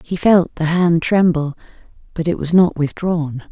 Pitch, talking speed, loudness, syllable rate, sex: 165 Hz, 170 wpm, -16 LUFS, 4.3 syllables/s, female